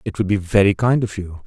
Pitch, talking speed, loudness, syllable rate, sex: 100 Hz, 285 wpm, -18 LUFS, 5.9 syllables/s, male